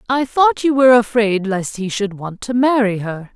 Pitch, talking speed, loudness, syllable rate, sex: 225 Hz, 215 wpm, -16 LUFS, 4.8 syllables/s, female